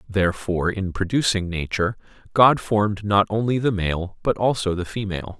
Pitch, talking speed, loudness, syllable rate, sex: 100 Hz, 155 wpm, -22 LUFS, 5.4 syllables/s, male